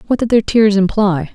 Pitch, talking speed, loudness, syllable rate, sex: 205 Hz, 225 wpm, -13 LUFS, 5.3 syllables/s, female